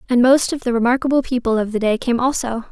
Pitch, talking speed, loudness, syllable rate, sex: 245 Hz, 245 wpm, -18 LUFS, 6.4 syllables/s, female